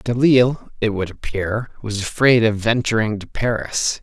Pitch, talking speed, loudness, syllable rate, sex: 110 Hz, 150 wpm, -19 LUFS, 4.5 syllables/s, male